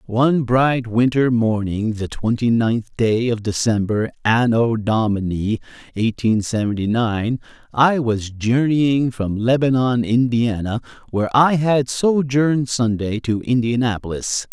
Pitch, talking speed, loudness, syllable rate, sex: 120 Hz, 115 wpm, -19 LUFS, 4.0 syllables/s, male